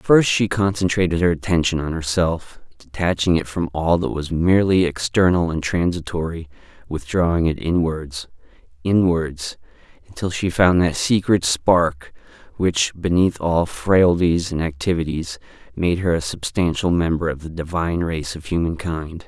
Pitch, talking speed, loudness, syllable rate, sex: 85 Hz, 135 wpm, -20 LUFS, 4.6 syllables/s, male